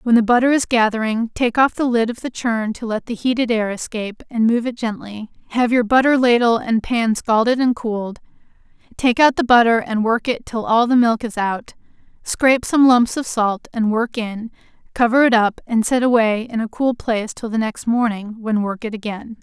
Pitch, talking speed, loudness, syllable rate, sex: 230 Hz, 215 wpm, -18 LUFS, 5.1 syllables/s, female